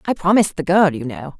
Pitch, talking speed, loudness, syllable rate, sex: 165 Hz, 260 wpm, -17 LUFS, 6.5 syllables/s, female